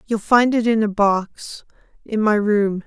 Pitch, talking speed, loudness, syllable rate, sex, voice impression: 215 Hz, 170 wpm, -18 LUFS, 3.8 syllables/s, female, feminine, very adult-like, intellectual